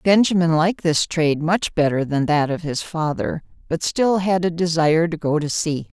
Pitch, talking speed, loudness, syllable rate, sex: 165 Hz, 200 wpm, -20 LUFS, 5.0 syllables/s, female